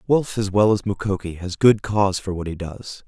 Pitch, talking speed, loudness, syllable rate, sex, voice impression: 100 Hz, 235 wpm, -21 LUFS, 5.2 syllables/s, male, very masculine, adult-like, slightly thick, cool, intellectual, slightly sweet